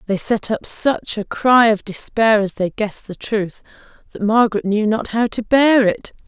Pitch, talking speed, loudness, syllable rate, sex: 215 Hz, 200 wpm, -17 LUFS, 4.6 syllables/s, female